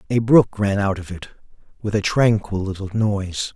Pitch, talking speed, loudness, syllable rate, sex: 100 Hz, 185 wpm, -20 LUFS, 4.9 syllables/s, male